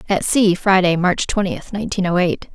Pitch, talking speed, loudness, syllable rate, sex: 190 Hz, 190 wpm, -17 LUFS, 5.1 syllables/s, female